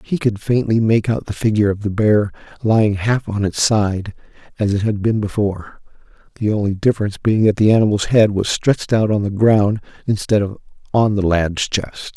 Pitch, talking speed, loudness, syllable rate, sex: 105 Hz, 195 wpm, -17 LUFS, 5.5 syllables/s, male